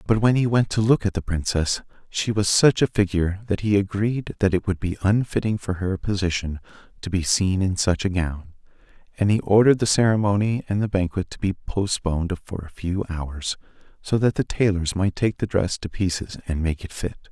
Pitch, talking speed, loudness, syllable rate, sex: 95 Hz, 210 wpm, -22 LUFS, 5.4 syllables/s, male